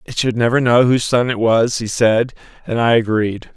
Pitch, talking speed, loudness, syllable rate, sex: 115 Hz, 220 wpm, -16 LUFS, 5.1 syllables/s, male